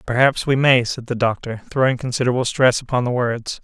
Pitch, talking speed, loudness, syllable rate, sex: 125 Hz, 200 wpm, -19 LUFS, 5.9 syllables/s, male